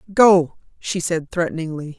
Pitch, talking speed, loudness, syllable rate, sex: 170 Hz, 120 wpm, -19 LUFS, 4.7 syllables/s, female